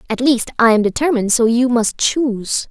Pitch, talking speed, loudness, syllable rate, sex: 240 Hz, 200 wpm, -15 LUFS, 5.4 syllables/s, female